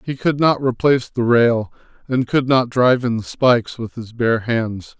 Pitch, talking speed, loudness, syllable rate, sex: 120 Hz, 205 wpm, -18 LUFS, 4.7 syllables/s, male